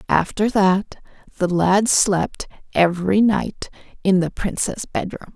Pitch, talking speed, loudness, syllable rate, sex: 190 Hz, 125 wpm, -19 LUFS, 4.0 syllables/s, female